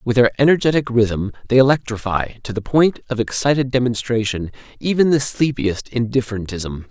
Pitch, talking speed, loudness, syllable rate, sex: 120 Hz, 140 wpm, -18 LUFS, 5.3 syllables/s, male